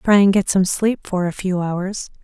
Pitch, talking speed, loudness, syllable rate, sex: 190 Hz, 240 wpm, -19 LUFS, 4.4 syllables/s, female